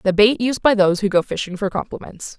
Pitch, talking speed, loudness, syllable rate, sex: 205 Hz, 250 wpm, -18 LUFS, 6.0 syllables/s, female